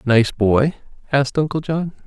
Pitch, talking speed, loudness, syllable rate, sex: 135 Hz, 145 wpm, -19 LUFS, 4.8 syllables/s, male